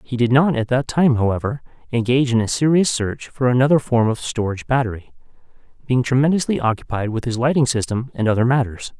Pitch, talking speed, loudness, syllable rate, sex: 125 Hz, 185 wpm, -19 LUFS, 6.1 syllables/s, male